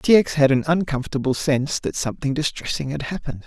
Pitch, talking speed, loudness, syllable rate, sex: 145 Hz, 190 wpm, -22 LUFS, 6.5 syllables/s, male